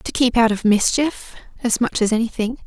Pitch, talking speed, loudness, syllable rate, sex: 235 Hz, 200 wpm, -19 LUFS, 5.1 syllables/s, female